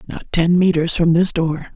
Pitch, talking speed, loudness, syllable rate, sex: 170 Hz, 205 wpm, -17 LUFS, 4.8 syllables/s, female